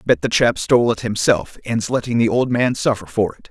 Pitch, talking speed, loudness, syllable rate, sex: 110 Hz, 255 wpm, -18 LUFS, 5.3 syllables/s, male